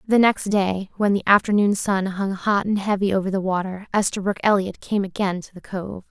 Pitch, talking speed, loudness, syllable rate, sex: 195 Hz, 205 wpm, -21 LUFS, 5.2 syllables/s, female